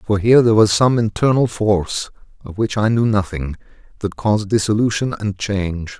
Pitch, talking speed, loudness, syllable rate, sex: 105 Hz, 170 wpm, -17 LUFS, 5.5 syllables/s, male